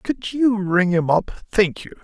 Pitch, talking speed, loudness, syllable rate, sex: 200 Hz, 175 wpm, -20 LUFS, 3.9 syllables/s, male